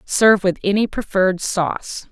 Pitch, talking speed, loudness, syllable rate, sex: 195 Hz, 140 wpm, -18 LUFS, 5.1 syllables/s, female